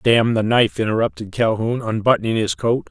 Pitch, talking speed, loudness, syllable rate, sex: 115 Hz, 165 wpm, -19 LUFS, 5.7 syllables/s, male